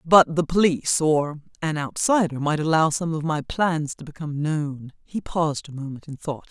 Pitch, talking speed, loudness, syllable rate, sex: 155 Hz, 195 wpm, -23 LUFS, 5.1 syllables/s, female